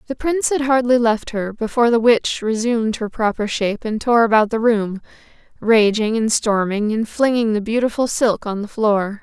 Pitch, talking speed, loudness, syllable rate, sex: 225 Hz, 190 wpm, -18 LUFS, 5.1 syllables/s, female